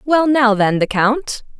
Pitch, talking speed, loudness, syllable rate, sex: 245 Hz, 190 wpm, -15 LUFS, 3.6 syllables/s, female